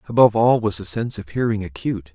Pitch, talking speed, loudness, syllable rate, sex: 100 Hz, 225 wpm, -20 LUFS, 7.1 syllables/s, male